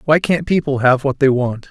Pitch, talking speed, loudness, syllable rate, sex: 140 Hz, 245 wpm, -16 LUFS, 5.0 syllables/s, male